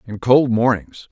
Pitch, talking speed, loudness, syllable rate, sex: 120 Hz, 160 wpm, -17 LUFS, 4.1 syllables/s, male